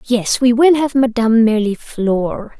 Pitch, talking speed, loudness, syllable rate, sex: 235 Hz, 140 wpm, -14 LUFS, 4.6 syllables/s, female